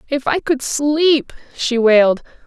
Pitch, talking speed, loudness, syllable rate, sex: 270 Hz, 145 wpm, -16 LUFS, 3.7 syllables/s, female